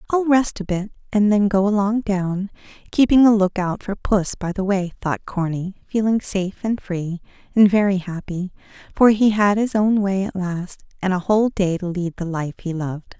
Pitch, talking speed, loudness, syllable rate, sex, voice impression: 195 Hz, 205 wpm, -20 LUFS, 4.9 syllables/s, female, very feminine, very middle-aged, very thin, slightly tensed, slightly weak, bright, very soft, clear, fluent, slightly raspy, cute, very intellectual, very refreshing, sincere, very calm, very friendly, very reassuring, very unique, very elegant, slightly wild, very sweet, lively, very kind, very modest, light